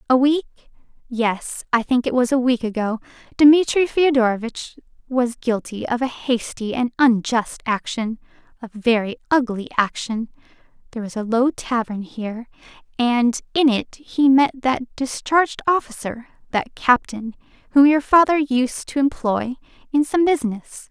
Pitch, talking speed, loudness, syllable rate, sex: 250 Hz, 130 wpm, -20 LUFS, 4.5 syllables/s, female